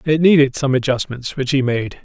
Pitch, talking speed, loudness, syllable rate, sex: 135 Hz, 205 wpm, -17 LUFS, 5.2 syllables/s, male